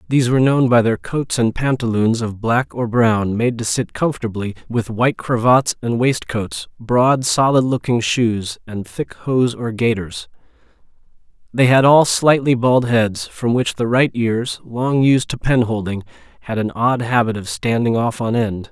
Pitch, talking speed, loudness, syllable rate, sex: 120 Hz, 175 wpm, -17 LUFS, 4.4 syllables/s, male